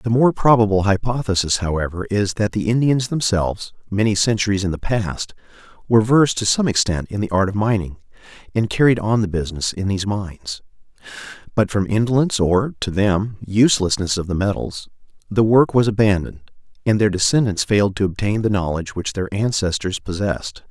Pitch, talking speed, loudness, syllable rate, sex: 100 Hz, 170 wpm, -19 LUFS, 5.7 syllables/s, male